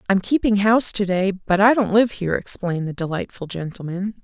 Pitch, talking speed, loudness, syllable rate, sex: 195 Hz, 200 wpm, -20 LUFS, 5.8 syllables/s, female